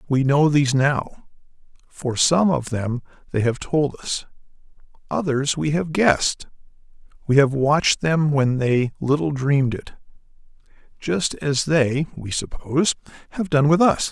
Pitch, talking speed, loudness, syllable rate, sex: 140 Hz, 145 wpm, -20 LUFS, 4.2 syllables/s, male